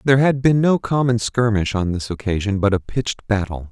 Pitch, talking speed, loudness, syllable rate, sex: 110 Hz, 210 wpm, -19 LUFS, 5.6 syllables/s, male